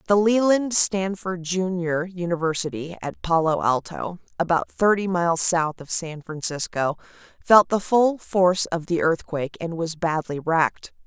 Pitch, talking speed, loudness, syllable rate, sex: 175 Hz, 140 wpm, -22 LUFS, 3.9 syllables/s, female